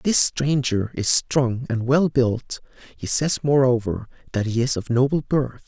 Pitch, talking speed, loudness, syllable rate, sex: 130 Hz, 170 wpm, -21 LUFS, 4.1 syllables/s, male